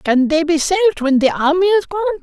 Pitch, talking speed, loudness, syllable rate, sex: 280 Hz, 245 wpm, -15 LUFS, 6.1 syllables/s, male